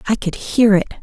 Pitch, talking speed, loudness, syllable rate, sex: 205 Hz, 235 wpm, -16 LUFS, 5.6 syllables/s, female